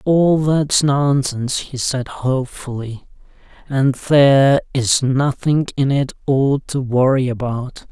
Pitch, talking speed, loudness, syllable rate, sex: 135 Hz, 120 wpm, -17 LUFS, 3.7 syllables/s, male